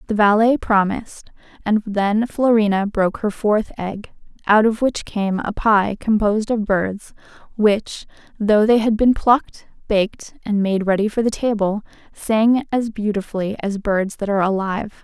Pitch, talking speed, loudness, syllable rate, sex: 210 Hz, 160 wpm, -19 LUFS, 4.6 syllables/s, female